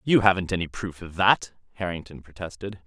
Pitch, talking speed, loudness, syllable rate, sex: 90 Hz, 170 wpm, -25 LUFS, 5.5 syllables/s, male